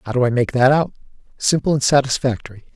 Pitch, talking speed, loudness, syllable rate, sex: 130 Hz, 195 wpm, -18 LUFS, 6.6 syllables/s, male